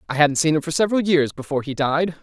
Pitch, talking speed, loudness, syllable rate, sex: 155 Hz, 270 wpm, -20 LUFS, 6.9 syllables/s, male